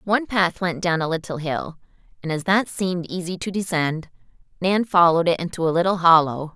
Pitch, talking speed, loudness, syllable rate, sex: 175 Hz, 190 wpm, -21 LUFS, 5.7 syllables/s, female